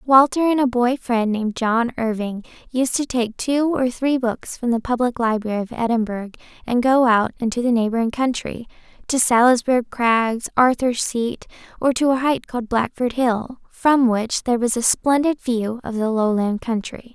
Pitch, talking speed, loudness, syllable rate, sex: 240 Hz, 180 wpm, -20 LUFS, 4.7 syllables/s, female